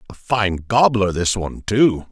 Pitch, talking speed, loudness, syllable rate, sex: 105 Hz, 170 wpm, -18 LUFS, 4.3 syllables/s, male